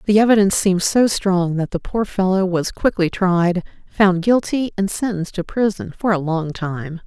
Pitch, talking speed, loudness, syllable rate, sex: 190 Hz, 185 wpm, -18 LUFS, 4.9 syllables/s, female